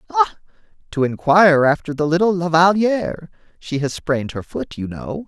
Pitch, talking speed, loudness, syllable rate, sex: 160 Hz, 170 wpm, -18 LUFS, 5.1 syllables/s, male